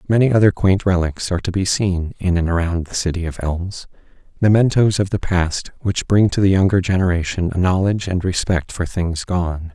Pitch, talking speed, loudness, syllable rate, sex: 90 Hz, 195 wpm, -18 LUFS, 5.3 syllables/s, male